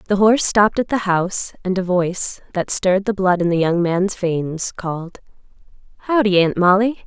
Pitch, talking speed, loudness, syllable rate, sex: 190 Hz, 185 wpm, -18 LUFS, 5.1 syllables/s, female